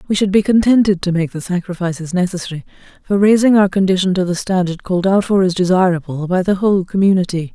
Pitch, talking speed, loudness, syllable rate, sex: 185 Hz, 200 wpm, -15 LUFS, 6.4 syllables/s, female